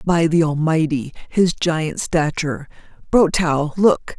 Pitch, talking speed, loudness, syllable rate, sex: 160 Hz, 85 wpm, -18 LUFS, 3.8 syllables/s, female